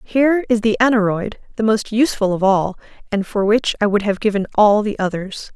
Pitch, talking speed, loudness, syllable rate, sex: 210 Hz, 205 wpm, -17 LUFS, 5.5 syllables/s, female